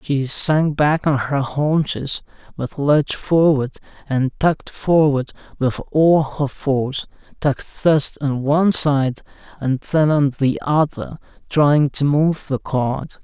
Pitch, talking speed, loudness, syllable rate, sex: 145 Hz, 140 wpm, -18 LUFS, 3.6 syllables/s, male